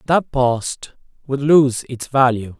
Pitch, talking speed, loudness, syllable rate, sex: 130 Hz, 140 wpm, -17 LUFS, 3.4 syllables/s, male